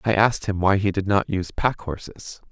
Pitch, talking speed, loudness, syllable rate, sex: 100 Hz, 240 wpm, -22 LUFS, 5.6 syllables/s, male